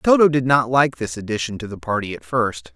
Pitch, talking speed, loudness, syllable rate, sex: 115 Hz, 240 wpm, -20 LUFS, 5.5 syllables/s, male